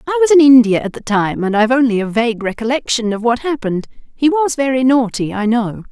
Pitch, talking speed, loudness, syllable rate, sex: 240 Hz, 225 wpm, -14 LUFS, 6.2 syllables/s, female